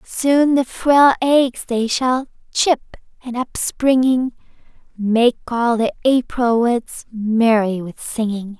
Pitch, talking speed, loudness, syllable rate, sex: 240 Hz, 120 wpm, -17 LUFS, 3.1 syllables/s, female